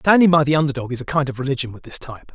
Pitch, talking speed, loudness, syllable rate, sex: 140 Hz, 335 wpm, -19 LUFS, 7.8 syllables/s, male